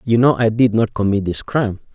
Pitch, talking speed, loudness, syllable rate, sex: 110 Hz, 245 wpm, -17 LUFS, 6.0 syllables/s, male